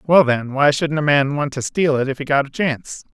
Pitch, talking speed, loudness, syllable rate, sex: 145 Hz, 280 wpm, -18 LUFS, 5.3 syllables/s, male